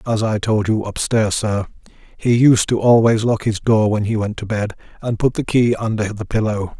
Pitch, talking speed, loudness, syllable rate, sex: 110 Hz, 220 wpm, -18 LUFS, 4.9 syllables/s, male